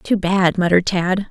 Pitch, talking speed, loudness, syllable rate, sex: 185 Hz, 185 wpm, -17 LUFS, 4.8 syllables/s, female